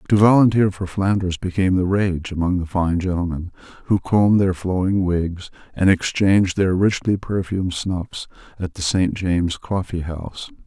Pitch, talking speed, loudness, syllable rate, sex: 90 Hz, 150 wpm, -20 LUFS, 4.9 syllables/s, male